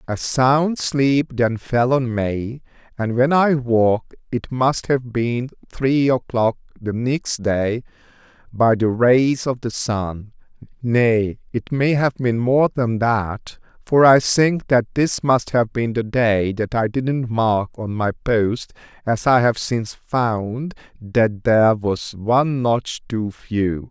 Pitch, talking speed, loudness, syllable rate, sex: 120 Hz, 160 wpm, -19 LUFS, 3.3 syllables/s, male